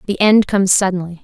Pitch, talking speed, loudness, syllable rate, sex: 190 Hz, 195 wpm, -14 LUFS, 6.5 syllables/s, female